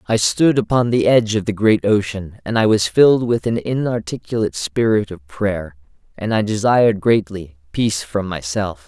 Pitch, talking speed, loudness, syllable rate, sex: 105 Hz, 170 wpm, -17 LUFS, 5.0 syllables/s, male